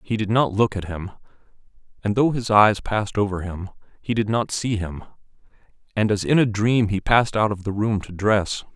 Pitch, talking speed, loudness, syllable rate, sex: 105 Hz, 215 wpm, -21 LUFS, 5.2 syllables/s, male